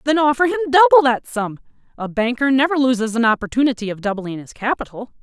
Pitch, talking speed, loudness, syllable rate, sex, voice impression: 250 Hz, 185 wpm, -18 LUFS, 6.2 syllables/s, female, feminine, adult-like, powerful, slightly unique, slightly intense